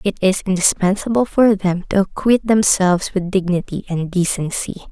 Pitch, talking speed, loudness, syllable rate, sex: 190 Hz, 145 wpm, -17 LUFS, 5.1 syllables/s, female